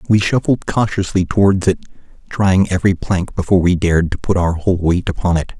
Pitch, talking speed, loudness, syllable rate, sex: 95 Hz, 195 wpm, -16 LUFS, 6.0 syllables/s, male